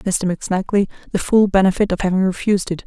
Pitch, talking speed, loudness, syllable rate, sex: 190 Hz, 190 wpm, -18 LUFS, 6.6 syllables/s, female